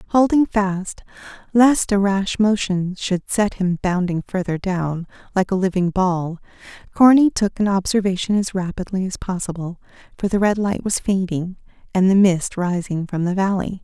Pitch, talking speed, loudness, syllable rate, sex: 190 Hz, 160 wpm, -19 LUFS, 4.6 syllables/s, female